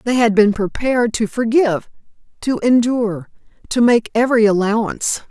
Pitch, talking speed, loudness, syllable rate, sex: 225 Hz, 135 wpm, -16 LUFS, 5.5 syllables/s, female